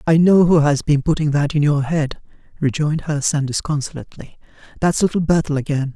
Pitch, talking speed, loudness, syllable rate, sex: 150 Hz, 180 wpm, -18 LUFS, 5.8 syllables/s, male